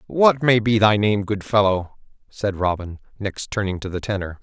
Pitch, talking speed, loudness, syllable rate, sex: 100 Hz, 190 wpm, -20 LUFS, 4.8 syllables/s, male